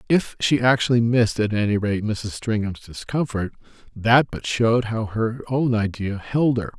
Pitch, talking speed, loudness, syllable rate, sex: 115 Hz, 170 wpm, -22 LUFS, 4.6 syllables/s, male